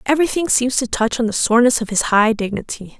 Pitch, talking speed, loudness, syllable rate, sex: 235 Hz, 220 wpm, -17 LUFS, 6.3 syllables/s, female